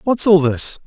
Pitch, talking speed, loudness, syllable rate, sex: 175 Hz, 210 wpm, -15 LUFS, 4.1 syllables/s, male